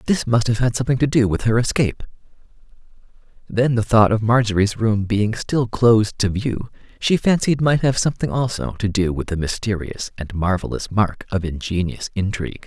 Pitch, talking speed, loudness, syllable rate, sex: 110 Hz, 180 wpm, -20 LUFS, 5.4 syllables/s, male